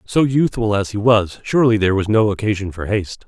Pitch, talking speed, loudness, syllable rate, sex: 105 Hz, 220 wpm, -17 LUFS, 6.1 syllables/s, male